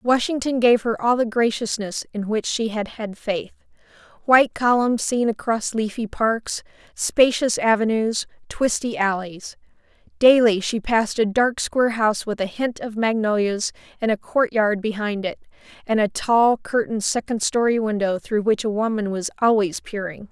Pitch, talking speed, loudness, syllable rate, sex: 220 Hz, 155 wpm, -21 LUFS, 4.7 syllables/s, female